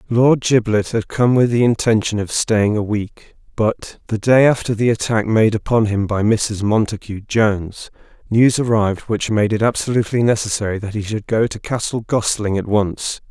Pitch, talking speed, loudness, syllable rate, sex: 110 Hz, 180 wpm, -17 LUFS, 5.0 syllables/s, male